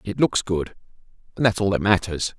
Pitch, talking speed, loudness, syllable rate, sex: 100 Hz, 200 wpm, -22 LUFS, 5.3 syllables/s, male